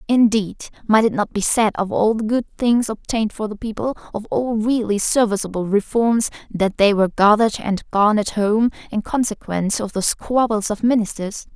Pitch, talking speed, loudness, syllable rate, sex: 215 Hz, 175 wpm, -19 LUFS, 5.2 syllables/s, female